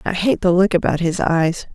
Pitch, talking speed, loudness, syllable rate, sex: 175 Hz, 240 wpm, -17 LUFS, 5.0 syllables/s, female